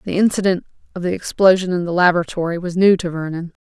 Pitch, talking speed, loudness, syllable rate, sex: 180 Hz, 200 wpm, -18 LUFS, 6.6 syllables/s, female